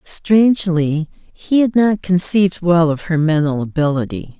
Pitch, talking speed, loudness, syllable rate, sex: 170 Hz, 135 wpm, -15 LUFS, 4.3 syllables/s, female